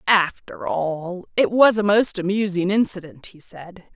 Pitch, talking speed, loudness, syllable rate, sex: 190 Hz, 150 wpm, -20 LUFS, 4.1 syllables/s, female